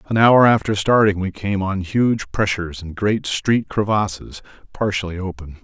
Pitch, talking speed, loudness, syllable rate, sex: 100 Hz, 160 wpm, -19 LUFS, 4.5 syllables/s, male